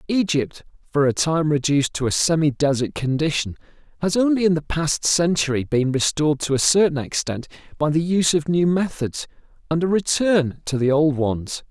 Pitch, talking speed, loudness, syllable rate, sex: 155 Hz, 180 wpm, -20 LUFS, 5.2 syllables/s, male